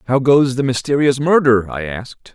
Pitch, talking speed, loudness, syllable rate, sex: 130 Hz, 180 wpm, -15 LUFS, 5.1 syllables/s, male